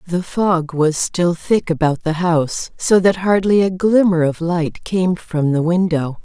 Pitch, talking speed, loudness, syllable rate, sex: 175 Hz, 185 wpm, -17 LUFS, 4.0 syllables/s, female